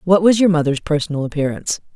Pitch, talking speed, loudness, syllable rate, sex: 165 Hz, 185 wpm, -17 LUFS, 7.0 syllables/s, female